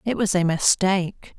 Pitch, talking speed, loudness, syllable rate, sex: 185 Hz, 175 wpm, -20 LUFS, 4.7 syllables/s, female